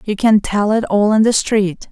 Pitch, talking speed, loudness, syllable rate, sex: 210 Hz, 250 wpm, -15 LUFS, 4.4 syllables/s, female